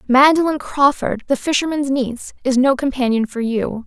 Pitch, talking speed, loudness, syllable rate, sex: 265 Hz, 155 wpm, -17 LUFS, 5.1 syllables/s, female